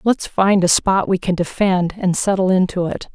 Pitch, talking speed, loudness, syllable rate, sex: 185 Hz, 210 wpm, -17 LUFS, 4.7 syllables/s, female